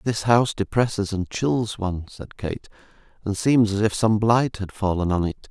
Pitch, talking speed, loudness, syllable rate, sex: 105 Hz, 195 wpm, -22 LUFS, 4.9 syllables/s, male